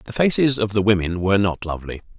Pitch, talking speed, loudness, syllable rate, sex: 100 Hz, 220 wpm, -20 LUFS, 6.5 syllables/s, male